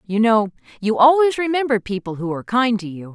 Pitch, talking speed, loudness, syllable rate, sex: 225 Hz, 210 wpm, -18 LUFS, 5.8 syllables/s, female